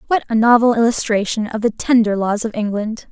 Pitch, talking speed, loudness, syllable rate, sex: 225 Hz, 195 wpm, -16 LUFS, 5.6 syllables/s, female